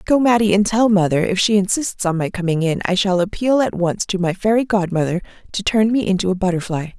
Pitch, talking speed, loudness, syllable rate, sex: 195 Hz, 230 wpm, -18 LUFS, 5.8 syllables/s, female